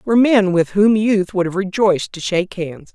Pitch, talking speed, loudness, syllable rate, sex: 195 Hz, 225 wpm, -16 LUFS, 5.3 syllables/s, female